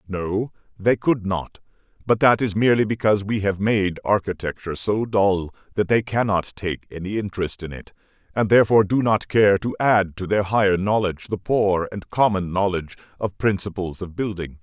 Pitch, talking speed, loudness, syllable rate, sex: 100 Hz, 175 wpm, -21 LUFS, 5.3 syllables/s, male